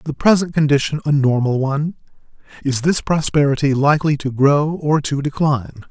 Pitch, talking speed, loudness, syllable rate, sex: 145 Hz, 150 wpm, -17 LUFS, 5.5 syllables/s, male